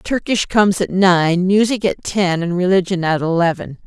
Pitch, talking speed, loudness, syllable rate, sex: 185 Hz, 170 wpm, -16 LUFS, 4.9 syllables/s, female